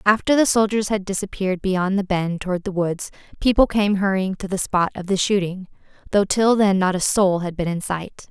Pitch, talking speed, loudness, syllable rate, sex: 195 Hz, 215 wpm, -20 LUFS, 5.3 syllables/s, female